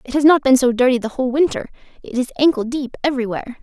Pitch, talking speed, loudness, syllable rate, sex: 260 Hz, 230 wpm, -17 LUFS, 7.4 syllables/s, female